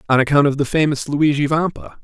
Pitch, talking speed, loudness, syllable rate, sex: 145 Hz, 205 wpm, -17 LUFS, 6.0 syllables/s, male